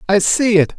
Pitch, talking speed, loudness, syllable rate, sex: 200 Hz, 230 wpm, -14 LUFS, 4.9 syllables/s, male